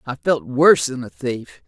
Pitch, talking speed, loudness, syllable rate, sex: 125 Hz, 215 wpm, -18 LUFS, 4.6 syllables/s, male